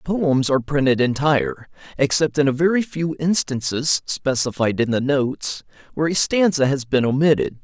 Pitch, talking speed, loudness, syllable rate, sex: 145 Hz, 165 wpm, -19 LUFS, 4.7 syllables/s, male